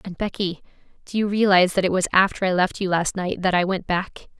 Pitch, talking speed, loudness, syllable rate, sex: 185 Hz, 245 wpm, -21 LUFS, 6.3 syllables/s, female